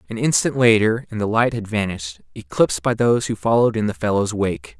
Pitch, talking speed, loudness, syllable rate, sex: 110 Hz, 215 wpm, -19 LUFS, 6.1 syllables/s, male